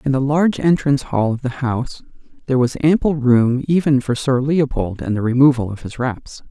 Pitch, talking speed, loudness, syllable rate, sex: 130 Hz, 205 wpm, -17 LUFS, 5.4 syllables/s, male